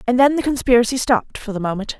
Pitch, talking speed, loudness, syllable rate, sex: 240 Hz, 240 wpm, -18 LUFS, 7.1 syllables/s, female